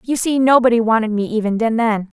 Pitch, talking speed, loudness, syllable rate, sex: 230 Hz, 190 wpm, -16 LUFS, 5.5 syllables/s, female